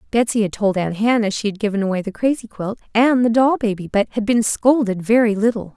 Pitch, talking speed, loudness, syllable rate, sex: 220 Hz, 230 wpm, -18 LUFS, 5.8 syllables/s, female